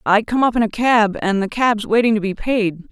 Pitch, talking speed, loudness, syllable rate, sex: 215 Hz, 270 wpm, -17 LUFS, 4.9 syllables/s, female